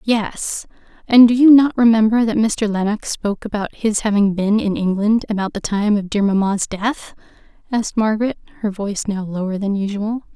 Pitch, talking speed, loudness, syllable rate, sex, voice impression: 210 Hz, 175 wpm, -17 LUFS, 5.2 syllables/s, female, very feminine, slightly adult-like, slightly soft, slightly cute, slightly calm, friendly, slightly sweet, kind